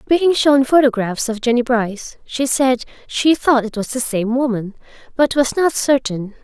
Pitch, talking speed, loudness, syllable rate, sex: 250 Hz, 175 wpm, -17 LUFS, 4.5 syllables/s, female